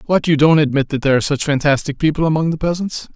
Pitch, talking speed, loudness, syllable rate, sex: 150 Hz, 245 wpm, -16 LUFS, 7.1 syllables/s, male